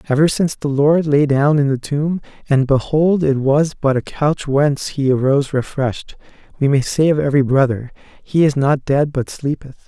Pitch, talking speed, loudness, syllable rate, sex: 145 Hz, 195 wpm, -17 LUFS, 5.1 syllables/s, male